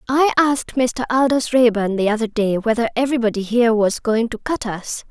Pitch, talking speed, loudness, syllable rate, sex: 235 Hz, 190 wpm, -18 LUFS, 5.5 syllables/s, female